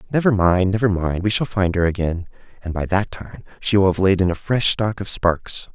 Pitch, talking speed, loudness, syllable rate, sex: 95 Hz, 240 wpm, -19 LUFS, 5.3 syllables/s, male